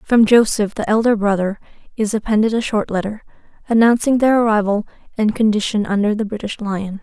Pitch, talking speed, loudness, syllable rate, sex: 215 Hz, 160 wpm, -17 LUFS, 5.7 syllables/s, female